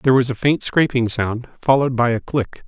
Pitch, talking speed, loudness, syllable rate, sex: 125 Hz, 225 wpm, -19 LUFS, 5.7 syllables/s, male